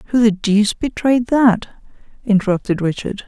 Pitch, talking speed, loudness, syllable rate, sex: 220 Hz, 130 wpm, -17 LUFS, 4.9 syllables/s, female